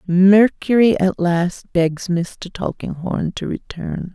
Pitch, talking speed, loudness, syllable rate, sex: 185 Hz, 115 wpm, -18 LUFS, 3.3 syllables/s, female